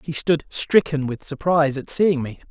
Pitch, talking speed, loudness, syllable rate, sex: 150 Hz, 190 wpm, -21 LUFS, 4.8 syllables/s, male